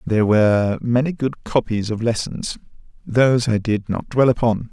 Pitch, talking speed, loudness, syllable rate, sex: 115 Hz, 165 wpm, -19 LUFS, 4.8 syllables/s, male